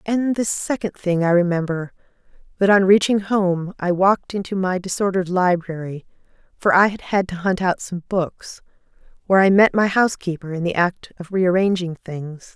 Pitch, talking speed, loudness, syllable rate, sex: 185 Hz, 170 wpm, -19 LUFS, 4.5 syllables/s, female